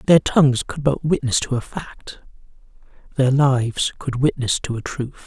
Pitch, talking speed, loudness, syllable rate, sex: 130 Hz, 170 wpm, -20 LUFS, 4.6 syllables/s, male